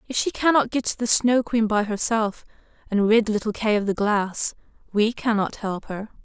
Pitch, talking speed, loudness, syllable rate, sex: 220 Hz, 200 wpm, -22 LUFS, 4.8 syllables/s, female